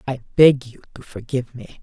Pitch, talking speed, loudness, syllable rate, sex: 130 Hz, 195 wpm, -18 LUFS, 5.7 syllables/s, female